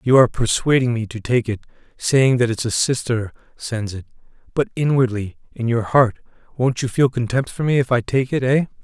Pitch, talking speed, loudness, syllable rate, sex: 120 Hz, 205 wpm, -19 LUFS, 5.4 syllables/s, male